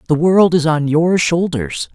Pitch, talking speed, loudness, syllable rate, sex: 160 Hz, 185 wpm, -15 LUFS, 4.0 syllables/s, male